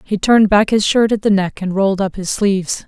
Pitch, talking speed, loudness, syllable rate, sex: 200 Hz, 270 wpm, -15 LUFS, 5.8 syllables/s, female